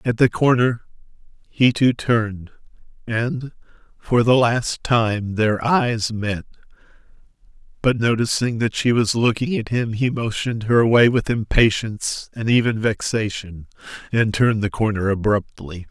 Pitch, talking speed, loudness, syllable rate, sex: 115 Hz, 135 wpm, -19 LUFS, 4.4 syllables/s, male